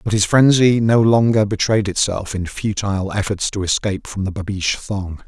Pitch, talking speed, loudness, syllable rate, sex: 100 Hz, 180 wpm, -18 LUFS, 5.0 syllables/s, male